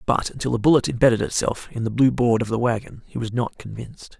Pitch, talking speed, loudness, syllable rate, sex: 120 Hz, 245 wpm, -21 LUFS, 6.3 syllables/s, male